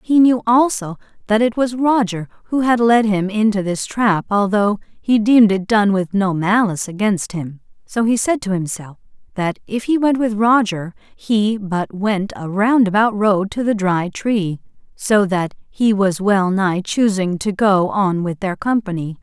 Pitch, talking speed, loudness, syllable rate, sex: 205 Hz, 180 wpm, -17 LUFS, 4.3 syllables/s, female